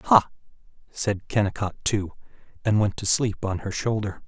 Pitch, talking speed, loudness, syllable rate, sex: 100 Hz, 155 wpm, -25 LUFS, 5.1 syllables/s, male